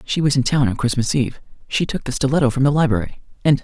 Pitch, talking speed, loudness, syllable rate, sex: 130 Hz, 250 wpm, -19 LUFS, 7.0 syllables/s, male